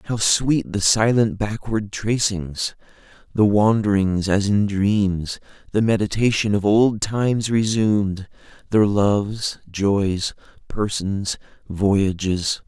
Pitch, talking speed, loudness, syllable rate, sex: 105 Hz, 100 wpm, -20 LUFS, 3.5 syllables/s, male